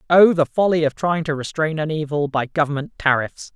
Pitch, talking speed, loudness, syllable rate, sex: 155 Hz, 205 wpm, -19 LUFS, 5.5 syllables/s, male